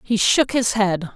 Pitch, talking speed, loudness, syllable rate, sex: 210 Hz, 210 wpm, -18 LUFS, 3.9 syllables/s, female